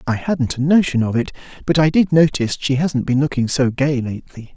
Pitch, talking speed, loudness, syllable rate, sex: 140 Hz, 225 wpm, -17 LUFS, 5.7 syllables/s, male